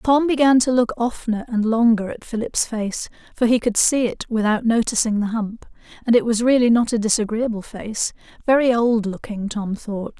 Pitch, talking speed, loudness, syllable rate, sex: 230 Hz, 180 wpm, -20 LUFS, 5.1 syllables/s, female